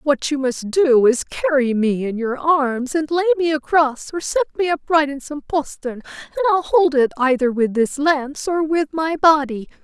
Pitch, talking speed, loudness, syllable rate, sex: 290 Hz, 200 wpm, -18 LUFS, 4.6 syllables/s, female